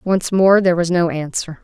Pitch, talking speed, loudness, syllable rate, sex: 175 Hz, 220 wpm, -16 LUFS, 5.1 syllables/s, female